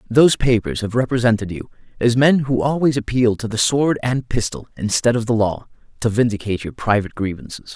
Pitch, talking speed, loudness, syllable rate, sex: 120 Hz, 185 wpm, -19 LUFS, 5.8 syllables/s, male